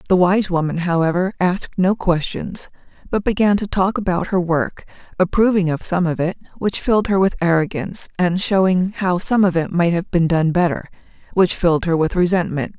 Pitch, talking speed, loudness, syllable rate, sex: 180 Hz, 190 wpm, -18 LUFS, 5.3 syllables/s, female